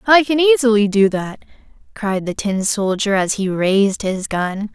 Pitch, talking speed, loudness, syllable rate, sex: 210 Hz, 175 wpm, -17 LUFS, 4.4 syllables/s, female